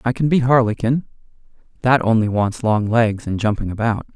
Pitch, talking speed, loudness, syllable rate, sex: 115 Hz, 175 wpm, -18 LUFS, 5.3 syllables/s, male